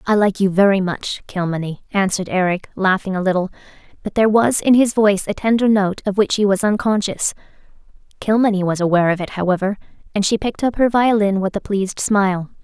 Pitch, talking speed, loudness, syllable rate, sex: 200 Hz, 195 wpm, -18 LUFS, 6.2 syllables/s, female